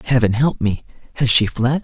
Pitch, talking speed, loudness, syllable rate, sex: 120 Hz, 195 wpm, -17 LUFS, 4.9 syllables/s, male